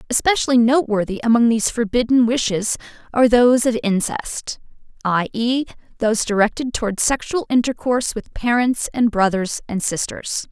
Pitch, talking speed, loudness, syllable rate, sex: 235 Hz, 130 wpm, -19 LUFS, 5.4 syllables/s, female